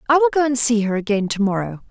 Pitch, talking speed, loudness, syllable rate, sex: 235 Hz, 285 wpm, -18 LUFS, 6.8 syllables/s, female